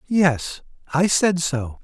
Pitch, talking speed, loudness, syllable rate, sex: 165 Hz, 130 wpm, -20 LUFS, 2.8 syllables/s, male